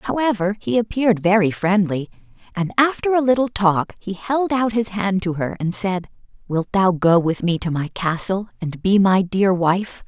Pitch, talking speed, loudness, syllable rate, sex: 195 Hz, 190 wpm, -19 LUFS, 4.6 syllables/s, female